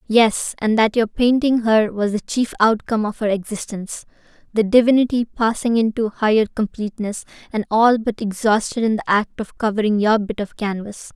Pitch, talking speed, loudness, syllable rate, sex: 220 Hz, 165 wpm, -19 LUFS, 5.2 syllables/s, female